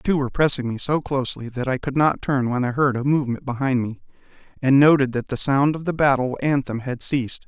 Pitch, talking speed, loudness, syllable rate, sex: 135 Hz, 235 wpm, -21 LUFS, 5.9 syllables/s, male